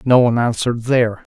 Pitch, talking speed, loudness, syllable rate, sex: 120 Hz, 180 wpm, -17 LUFS, 6.8 syllables/s, male